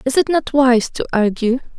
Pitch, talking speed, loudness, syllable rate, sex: 255 Hz, 200 wpm, -16 LUFS, 4.9 syllables/s, female